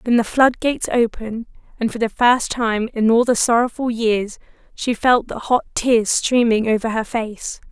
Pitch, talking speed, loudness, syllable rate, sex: 230 Hz, 180 wpm, -18 LUFS, 4.7 syllables/s, female